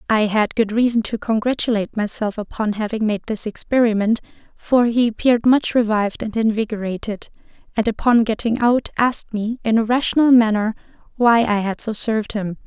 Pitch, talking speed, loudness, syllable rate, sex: 225 Hz, 165 wpm, -19 LUFS, 5.5 syllables/s, female